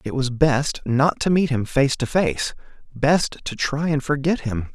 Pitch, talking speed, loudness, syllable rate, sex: 140 Hz, 200 wpm, -21 LUFS, 4.1 syllables/s, male